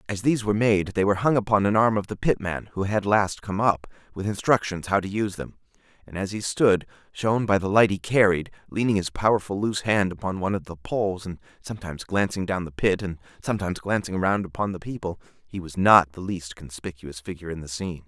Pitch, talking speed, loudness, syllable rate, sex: 100 Hz, 220 wpm, -24 LUFS, 6.2 syllables/s, male